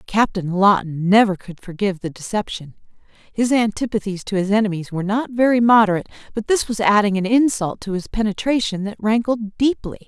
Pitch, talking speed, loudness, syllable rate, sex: 205 Hz, 165 wpm, -19 LUFS, 5.7 syllables/s, female